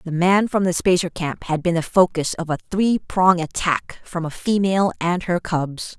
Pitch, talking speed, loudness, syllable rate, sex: 175 Hz, 210 wpm, -20 LUFS, 4.7 syllables/s, female